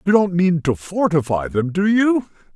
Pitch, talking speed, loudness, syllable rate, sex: 170 Hz, 190 wpm, -18 LUFS, 4.7 syllables/s, male